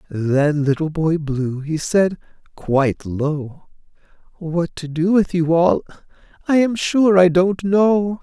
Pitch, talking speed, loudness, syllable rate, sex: 165 Hz, 145 wpm, -18 LUFS, 3.5 syllables/s, male